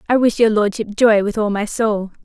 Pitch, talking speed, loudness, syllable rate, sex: 215 Hz, 240 wpm, -17 LUFS, 5.1 syllables/s, female